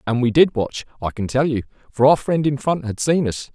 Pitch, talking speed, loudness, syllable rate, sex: 130 Hz, 270 wpm, -19 LUFS, 5.3 syllables/s, male